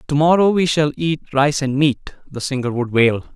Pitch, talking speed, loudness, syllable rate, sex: 145 Hz, 215 wpm, -17 LUFS, 4.9 syllables/s, male